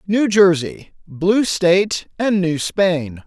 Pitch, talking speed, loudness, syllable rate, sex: 185 Hz, 130 wpm, -17 LUFS, 3.1 syllables/s, male